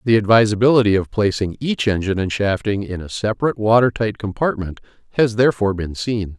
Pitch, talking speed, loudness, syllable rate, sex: 105 Hz, 170 wpm, -18 LUFS, 6.1 syllables/s, male